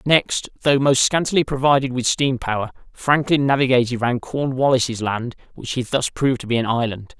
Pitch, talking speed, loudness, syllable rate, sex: 130 Hz, 175 wpm, -19 LUFS, 5.2 syllables/s, male